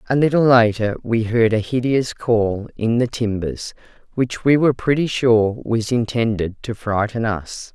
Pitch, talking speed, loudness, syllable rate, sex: 115 Hz, 165 wpm, -19 LUFS, 4.3 syllables/s, female